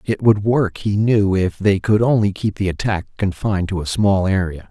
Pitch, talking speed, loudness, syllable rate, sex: 100 Hz, 215 wpm, -18 LUFS, 4.9 syllables/s, male